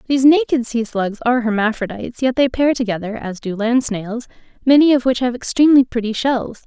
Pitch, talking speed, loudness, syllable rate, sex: 240 Hz, 190 wpm, -17 LUFS, 5.9 syllables/s, female